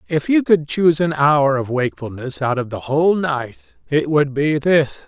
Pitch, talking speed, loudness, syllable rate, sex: 145 Hz, 200 wpm, -18 LUFS, 4.6 syllables/s, male